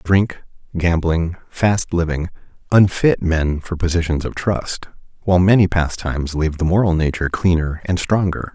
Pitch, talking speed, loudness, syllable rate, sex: 85 Hz, 140 wpm, -18 LUFS, 4.9 syllables/s, male